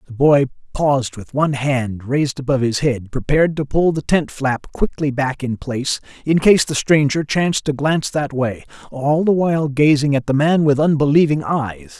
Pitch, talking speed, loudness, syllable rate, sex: 140 Hz, 195 wpm, -18 LUFS, 5.1 syllables/s, male